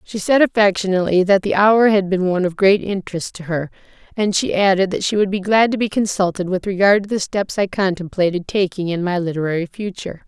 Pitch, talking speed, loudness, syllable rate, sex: 190 Hz, 215 wpm, -18 LUFS, 6.0 syllables/s, female